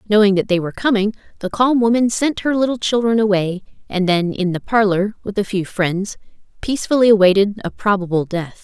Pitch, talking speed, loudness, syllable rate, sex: 205 Hz, 190 wpm, -17 LUFS, 5.7 syllables/s, female